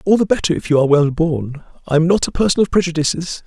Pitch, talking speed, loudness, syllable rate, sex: 165 Hz, 240 wpm, -16 LUFS, 6.7 syllables/s, male